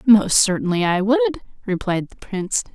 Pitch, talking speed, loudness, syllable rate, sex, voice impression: 210 Hz, 155 wpm, -19 LUFS, 5.3 syllables/s, female, very feminine, very young, very thin, tensed, powerful, very bright, soft, very clear, fluent, very cute, intellectual, very refreshing, slightly sincere, calm, very friendly, very reassuring, very unique, elegant, slightly wild, sweet, very lively, kind, intense, slightly sharp, light